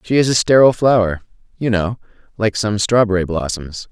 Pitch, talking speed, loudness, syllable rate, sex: 105 Hz, 155 wpm, -16 LUFS, 5.5 syllables/s, male